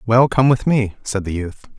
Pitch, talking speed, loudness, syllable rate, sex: 115 Hz, 235 wpm, -18 LUFS, 4.6 syllables/s, male